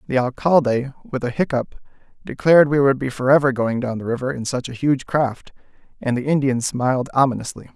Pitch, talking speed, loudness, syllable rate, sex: 130 Hz, 185 wpm, -19 LUFS, 5.7 syllables/s, male